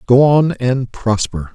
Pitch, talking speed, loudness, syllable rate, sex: 125 Hz, 155 wpm, -15 LUFS, 3.6 syllables/s, male